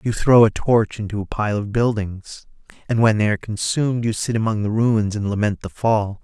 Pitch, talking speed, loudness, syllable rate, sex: 110 Hz, 220 wpm, -20 LUFS, 5.2 syllables/s, male